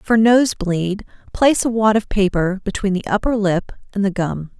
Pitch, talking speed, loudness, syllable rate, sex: 205 Hz, 195 wpm, -18 LUFS, 4.8 syllables/s, female